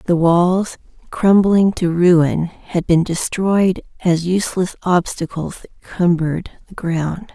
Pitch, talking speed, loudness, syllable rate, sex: 175 Hz, 125 wpm, -17 LUFS, 3.6 syllables/s, female